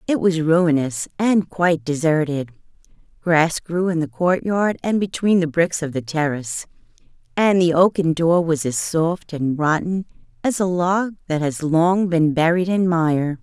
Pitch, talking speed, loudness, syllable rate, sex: 165 Hz, 165 wpm, -19 LUFS, 4.3 syllables/s, female